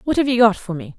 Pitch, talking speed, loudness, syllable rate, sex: 215 Hz, 365 wpm, -17 LUFS, 6.7 syllables/s, female